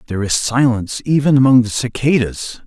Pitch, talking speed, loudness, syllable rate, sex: 125 Hz, 160 wpm, -15 LUFS, 5.8 syllables/s, male